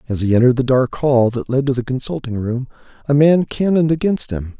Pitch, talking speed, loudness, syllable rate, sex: 130 Hz, 220 wpm, -17 LUFS, 6.0 syllables/s, male